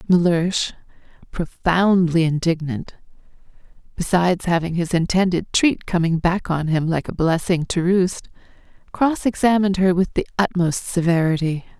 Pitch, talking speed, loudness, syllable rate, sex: 175 Hz, 120 wpm, -20 LUFS, 4.6 syllables/s, female